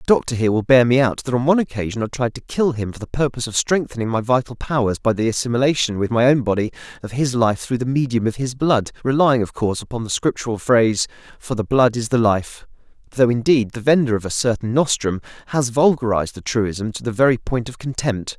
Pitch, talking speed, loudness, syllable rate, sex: 120 Hz, 230 wpm, -19 LUFS, 6.1 syllables/s, male